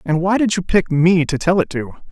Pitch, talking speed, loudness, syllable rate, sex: 170 Hz, 285 wpm, -17 LUFS, 5.2 syllables/s, male